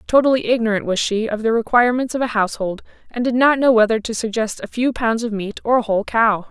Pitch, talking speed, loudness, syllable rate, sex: 230 Hz, 240 wpm, -18 LUFS, 6.3 syllables/s, female